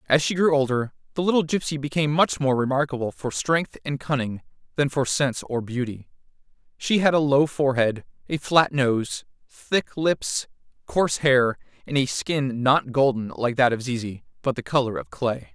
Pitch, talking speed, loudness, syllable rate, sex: 135 Hz, 180 wpm, -23 LUFS, 4.9 syllables/s, male